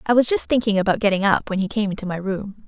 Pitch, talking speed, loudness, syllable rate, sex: 205 Hz, 290 wpm, -21 LUFS, 6.7 syllables/s, female